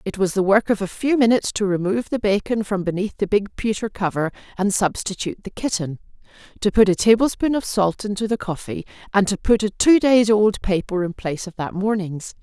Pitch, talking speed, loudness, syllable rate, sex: 200 Hz, 210 wpm, -20 LUFS, 5.9 syllables/s, female